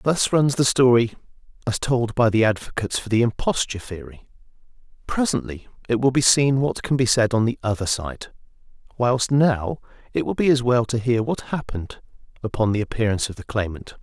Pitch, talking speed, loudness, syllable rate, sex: 120 Hz, 185 wpm, -21 LUFS, 5.5 syllables/s, male